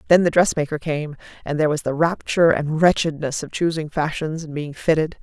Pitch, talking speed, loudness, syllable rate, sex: 155 Hz, 195 wpm, -20 LUFS, 5.7 syllables/s, female